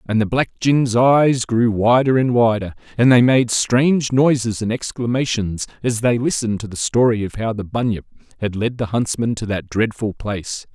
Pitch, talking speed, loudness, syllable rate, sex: 115 Hz, 190 wpm, -18 LUFS, 4.9 syllables/s, male